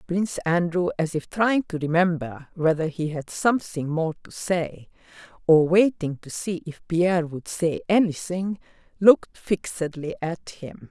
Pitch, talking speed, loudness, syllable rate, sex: 170 Hz, 150 wpm, -24 LUFS, 4.4 syllables/s, female